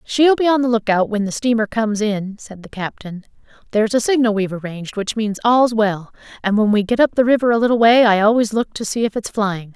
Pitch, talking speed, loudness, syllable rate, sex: 220 Hz, 245 wpm, -17 LUFS, 5.9 syllables/s, female